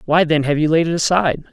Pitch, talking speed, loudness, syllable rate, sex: 155 Hz, 275 wpm, -16 LUFS, 6.8 syllables/s, male